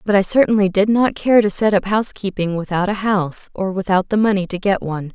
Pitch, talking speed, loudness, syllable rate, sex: 200 Hz, 235 wpm, -17 LUFS, 6.0 syllables/s, female